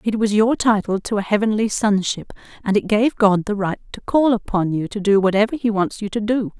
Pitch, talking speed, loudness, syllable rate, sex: 210 Hz, 235 wpm, -19 LUFS, 5.5 syllables/s, female